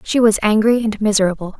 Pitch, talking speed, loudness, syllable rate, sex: 215 Hz, 190 wpm, -16 LUFS, 6.1 syllables/s, female